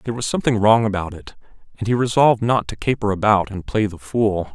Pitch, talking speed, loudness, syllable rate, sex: 105 Hz, 225 wpm, -19 LUFS, 6.2 syllables/s, male